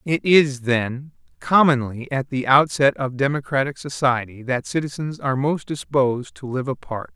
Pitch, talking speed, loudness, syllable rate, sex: 135 Hz, 150 wpm, -21 LUFS, 4.7 syllables/s, male